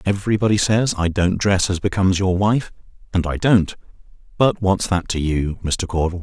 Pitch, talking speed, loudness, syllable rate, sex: 95 Hz, 185 wpm, -19 LUFS, 5.5 syllables/s, male